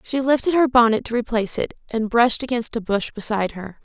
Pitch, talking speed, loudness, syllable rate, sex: 235 Hz, 220 wpm, -20 LUFS, 6.2 syllables/s, female